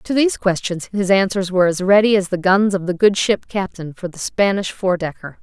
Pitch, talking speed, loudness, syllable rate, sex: 190 Hz, 230 wpm, -18 LUFS, 5.4 syllables/s, female